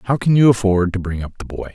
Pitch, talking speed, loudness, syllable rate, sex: 105 Hz, 310 wpm, -16 LUFS, 6.1 syllables/s, male